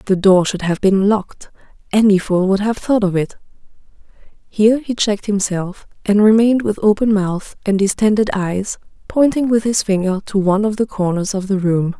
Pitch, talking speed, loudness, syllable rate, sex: 200 Hz, 185 wpm, -16 LUFS, 5.3 syllables/s, female